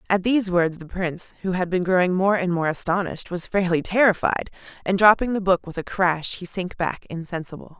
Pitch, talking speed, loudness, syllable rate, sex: 185 Hz, 210 wpm, -22 LUFS, 5.6 syllables/s, female